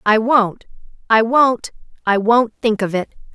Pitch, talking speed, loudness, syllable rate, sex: 225 Hz, 160 wpm, -16 LUFS, 4.0 syllables/s, female